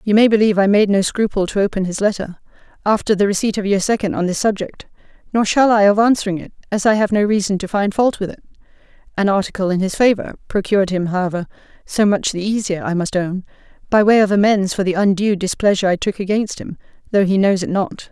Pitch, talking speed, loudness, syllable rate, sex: 200 Hz, 225 wpm, -17 LUFS, 6.3 syllables/s, female